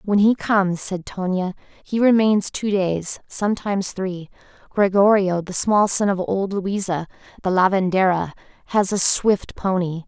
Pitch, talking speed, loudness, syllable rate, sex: 190 Hz, 145 wpm, -20 LUFS, 4.3 syllables/s, female